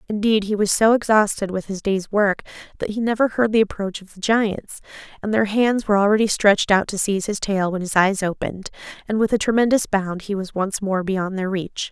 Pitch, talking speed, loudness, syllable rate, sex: 205 Hz, 225 wpm, -20 LUFS, 5.6 syllables/s, female